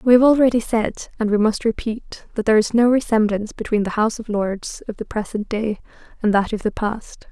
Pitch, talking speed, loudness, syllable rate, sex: 220 Hz, 220 wpm, -20 LUFS, 5.8 syllables/s, female